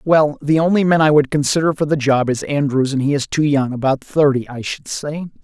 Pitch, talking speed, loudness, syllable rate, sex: 145 Hz, 230 wpm, -17 LUFS, 5.4 syllables/s, male